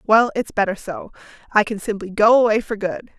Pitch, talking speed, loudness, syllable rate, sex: 215 Hz, 205 wpm, -19 LUFS, 5.4 syllables/s, female